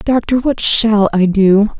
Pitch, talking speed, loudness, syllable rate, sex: 215 Hz, 165 wpm, -12 LUFS, 3.8 syllables/s, female